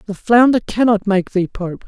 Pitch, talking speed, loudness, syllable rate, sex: 210 Hz, 190 wpm, -15 LUFS, 4.7 syllables/s, male